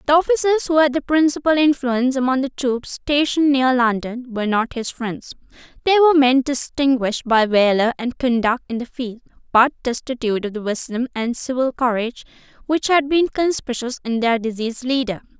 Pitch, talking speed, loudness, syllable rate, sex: 255 Hz, 170 wpm, -19 LUFS, 5.5 syllables/s, female